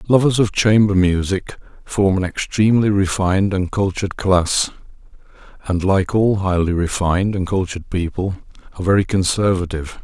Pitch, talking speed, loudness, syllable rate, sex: 95 Hz, 130 wpm, -18 LUFS, 5.3 syllables/s, male